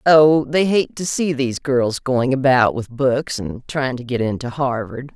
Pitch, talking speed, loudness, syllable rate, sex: 130 Hz, 200 wpm, -19 LUFS, 4.2 syllables/s, female